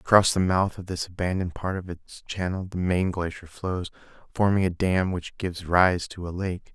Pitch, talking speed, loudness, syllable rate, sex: 90 Hz, 205 wpm, -26 LUFS, 5.0 syllables/s, male